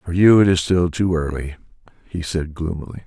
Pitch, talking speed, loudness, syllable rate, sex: 85 Hz, 195 wpm, -19 LUFS, 5.5 syllables/s, male